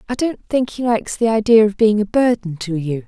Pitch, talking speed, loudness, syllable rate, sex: 215 Hz, 255 wpm, -17 LUFS, 5.6 syllables/s, female